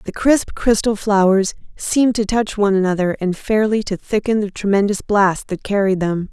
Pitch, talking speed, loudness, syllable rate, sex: 205 Hz, 180 wpm, -17 LUFS, 5.1 syllables/s, female